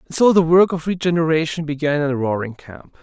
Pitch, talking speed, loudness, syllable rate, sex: 155 Hz, 200 wpm, -18 LUFS, 5.6 syllables/s, male